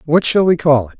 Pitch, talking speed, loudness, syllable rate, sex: 155 Hz, 300 wpm, -14 LUFS, 6.0 syllables/s, male